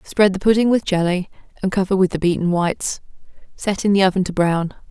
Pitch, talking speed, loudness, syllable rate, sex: 190 Hz, 210 wpm, -19 LUFS, 6.1 syllables/s, female